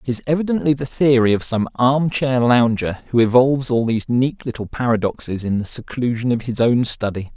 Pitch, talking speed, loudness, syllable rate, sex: 120 Hz, 195 wpm, -18 LUFS, 5.5 syllables/s, male